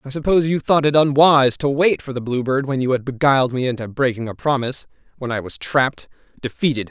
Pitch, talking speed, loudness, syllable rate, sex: 135 Hz, 215 wpm, -18 LUFS, 6.3 syllables/s, male